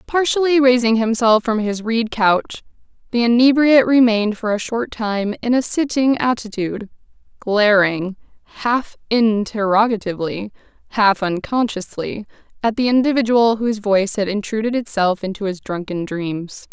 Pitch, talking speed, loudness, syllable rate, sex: 220 Hz, 120 wpm, -18 LUFS, 4.8 syllables/s, female